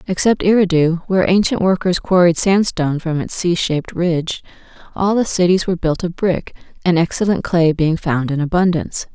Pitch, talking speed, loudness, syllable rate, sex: 175 Hz, 170 wpm, -16 LUFS, 5.5 syllables/s, female